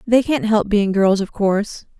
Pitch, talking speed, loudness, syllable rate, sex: 210 Hz, 210 wpm, -17 LUFS, 4.6 syllables/s, female